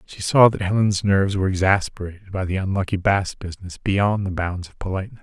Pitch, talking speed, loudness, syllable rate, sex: 95 Hz, 195 wpm, -21 LUFS, 6.1 syllables/s, male